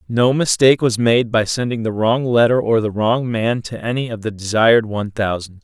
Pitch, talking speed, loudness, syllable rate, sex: 115 Hz, 215 wpm, -17 LUFS, 5.3 syllables/s, male